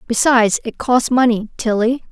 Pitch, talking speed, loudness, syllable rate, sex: 235 Hz, 140 wpm, -16 LUFS, 5.0 syllables/s, female